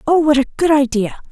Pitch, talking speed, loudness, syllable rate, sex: 285 Hz, 225 wpm, -15 LUFS, 6.1 syllables/s, female